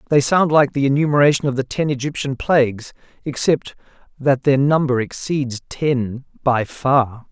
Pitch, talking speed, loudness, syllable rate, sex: 135 Hz, 150 wpm, -18 LUFS, 4.6 syllables/s, male